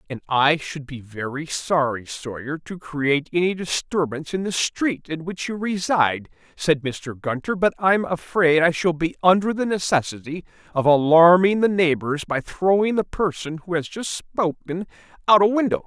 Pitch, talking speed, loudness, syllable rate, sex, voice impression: 165 Hz, 170 wpm, -21 LUFS, 4.7 syllables/s, male, masculine, very adult-like, slightly halting, refreshing, friendly, lively